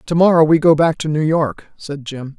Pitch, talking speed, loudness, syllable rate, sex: 155 Hz, 250 wpm, -15 LUFS, 5.0 syllables/s, female